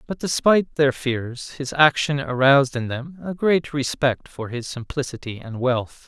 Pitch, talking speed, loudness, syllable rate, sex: 135 Hz, 170 wpm, -21 LUFS, 4.5 syllables/s, male